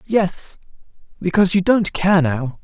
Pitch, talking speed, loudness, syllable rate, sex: 180 Hz, 115 wpm, -17 LUFS, 4.2 syllables/s, male